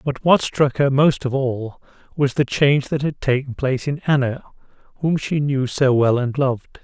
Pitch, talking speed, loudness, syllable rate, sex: 135 Hz, 200 wpm, -19 LUFS, 4.9 syllables/s, male